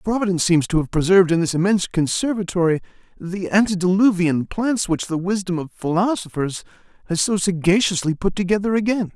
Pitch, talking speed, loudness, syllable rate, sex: 185 Hz, 150 wpm, -20 LUFS, 5.8 syllables/s, male